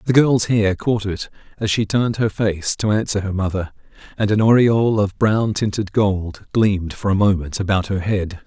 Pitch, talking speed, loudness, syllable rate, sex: 100 Hz, 200 wpm, -19 LUFS, 4.9 syllables/s, male